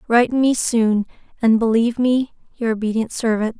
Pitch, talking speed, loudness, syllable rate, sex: 230 Hz, 150 wpm, -18 LUFS, 4.8 syllables/s, female